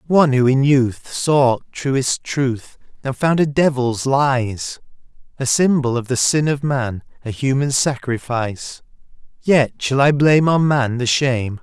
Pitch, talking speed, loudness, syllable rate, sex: 130 Hz, 155 wpm, -17 LUFS, 4.0 syllables/s, male